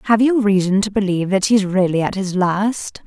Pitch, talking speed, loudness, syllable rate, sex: 200 Hz, 215 wpm, -17 LUFS, 5.2 syllables/s, female